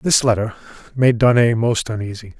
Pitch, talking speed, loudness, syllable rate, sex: 115 Hz, 150 wpm, -17 LUFS, 5.3 syllables/s, male